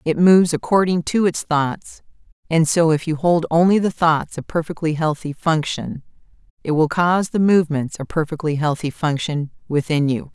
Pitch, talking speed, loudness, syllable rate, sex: 160 Hz, 170 wpm, -19 LUFS, 5.0 syllables/s, female